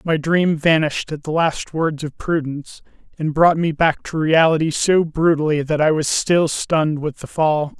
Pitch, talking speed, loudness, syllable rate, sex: 155 Hz, 190 wpm, -18 LUFS, 4.7 syllables/s, male